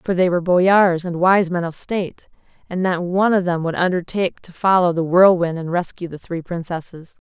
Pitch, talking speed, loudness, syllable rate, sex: 175 Hz, 205 wpm, -18 LUFS, 5.3 syllables/s, female